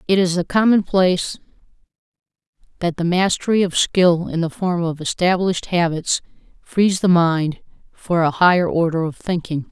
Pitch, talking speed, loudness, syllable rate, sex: 175 Hz, 150 wpm, -18 LUFS, 4.8 syllables/s, female